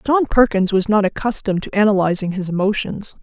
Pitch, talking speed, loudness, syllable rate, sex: 205 Hz, 170 wpm, -18 LUFS, 5.9 syllables/s, female